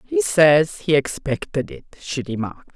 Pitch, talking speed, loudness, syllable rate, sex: 160 Hz, 150 wpm, -20 LUFS, 4.6 syllables/s, female